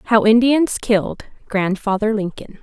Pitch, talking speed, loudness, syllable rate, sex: 215 Hz, 115 wpm, -17 LUFS, 4.4 syllables/s, female